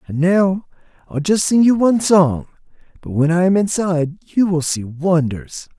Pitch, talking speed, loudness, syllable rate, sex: 170 Hz, 175 wpm, -16 LUFS, 4.6 syllables/s, male